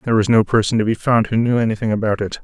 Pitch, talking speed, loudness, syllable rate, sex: 110 Hz, 295 wpm, -17 LUFS, 7.4 syllables/s, male